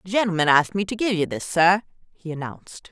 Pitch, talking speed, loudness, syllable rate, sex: 185 Hz, 225 wpm, -21 LUFS, 6.5 syllables/s, female